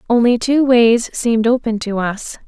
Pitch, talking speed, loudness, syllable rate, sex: 230 Hz, 170 wpm, -15 LUFS, 4.6 syllables/s, female